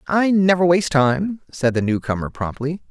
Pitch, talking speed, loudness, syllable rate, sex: 155 Hz, 165 wpm, -19 LUFS, 5.0 syllables/s, male